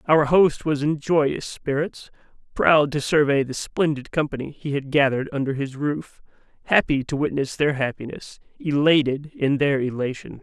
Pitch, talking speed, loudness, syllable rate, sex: 145 Hz, 155 wpm, -22 LUFS, 4.8 syllables/s, male